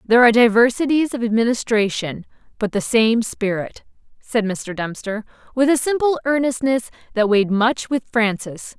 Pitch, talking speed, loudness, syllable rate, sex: 230 Hz, 145 wpm, -19 LUFS, 5.0 syllables/s, female